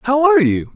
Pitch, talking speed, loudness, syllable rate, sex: 290 Hz, 240 wpm, -14 LUFS, 6.6 syllables/s, female